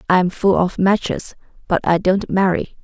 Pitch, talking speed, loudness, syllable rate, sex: 185 Hz, 190 wpm, -18 LUFS, 4.9 syllables/s, female